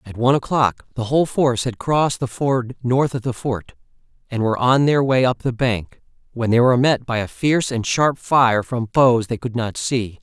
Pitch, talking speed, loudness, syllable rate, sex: 125 Hz, 225 wpm, -19 LUFS, 5.1 syllables/s, male